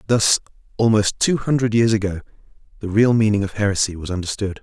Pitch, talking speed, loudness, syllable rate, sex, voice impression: 105 Hz, 170 wpm, -19 LUFS, 6.1 syllables/s, male, masculine, adult-like, slightly thick, fluent, cool, slightly sincere